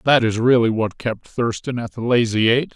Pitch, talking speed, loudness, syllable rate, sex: 115 Hz, 220 wpm, -19 LUFS, 4.9 syllables/s, male